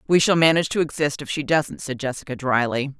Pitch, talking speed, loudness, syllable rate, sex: 145 Hz, 220 wpm, -21 LUFS, 6.1 syllables/s, female